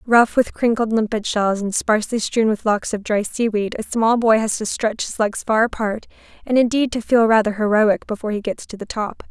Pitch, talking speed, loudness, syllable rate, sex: 220 Hz, 225 wpm, -19 LUFS, 5.3 syllables/s, female